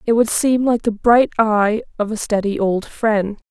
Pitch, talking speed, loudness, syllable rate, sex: 220 Hz, 205 wpm, -17 LUFS, 4.3 syllables/s, female